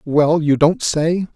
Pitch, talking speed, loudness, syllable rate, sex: 155 Hz, 180 wpm, -16 LUFS, 3.3 syllables/s, male